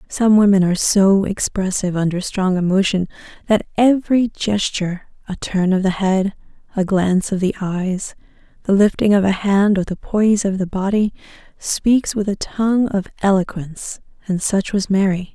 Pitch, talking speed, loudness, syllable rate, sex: 195 Hz, 165 wpm, -18 LUFS, 5.0 syllables/s, female